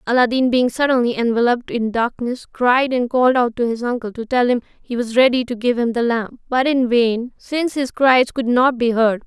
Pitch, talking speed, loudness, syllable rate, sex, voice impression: 245 Hz, 220 wpm, -18 LUFS, 5.2 syllables/s, female, gender-neutral, young, weak, slightly bright, slightly halting, slightly cute, slightly modest, light